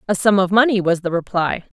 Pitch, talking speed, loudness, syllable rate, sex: 190 Hz, 235 wpm, -17 LUFS, 5.9 syllables/s, female